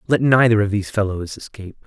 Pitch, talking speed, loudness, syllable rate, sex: 105 Hz, 195 wpm, -18 LUFS, 6.7 syllables/s, male